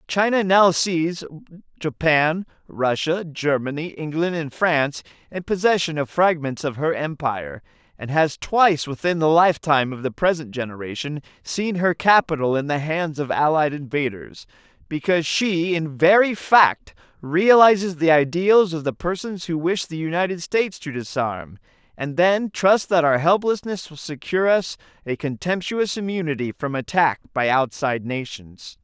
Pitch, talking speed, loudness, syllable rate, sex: 160 Hz, 145 wpm, -20 LUFS, 4.7 syllables/s, male